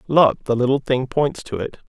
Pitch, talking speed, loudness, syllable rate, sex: 130 Hz, 220 wpm, -20 LUFS, 4.9 syllables/s, male